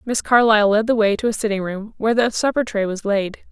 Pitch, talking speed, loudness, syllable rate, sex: 215 Hz, 255 wpm, -18 LUFS, 6.1 syllables/s, female